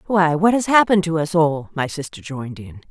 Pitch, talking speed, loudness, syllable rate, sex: 165 Hz, 225 wpm, -18 LUFS, 5.7 syllables/s, female